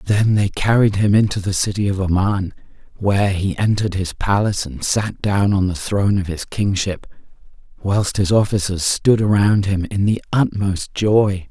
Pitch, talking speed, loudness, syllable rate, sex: 100 Hz, 170 wpm, -18 LUFS, 4.7 syllables/s, male